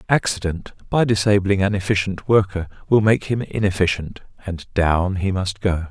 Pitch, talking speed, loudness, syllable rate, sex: 95 Hz, 150 wpm, -20 LUFS, 4.9 syllables/s, male